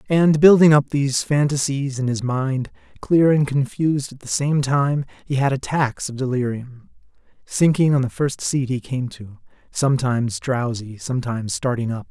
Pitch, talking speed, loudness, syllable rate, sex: 135 Hz, 160 wpm, -20 LUFS, 4.8 syllables/s, male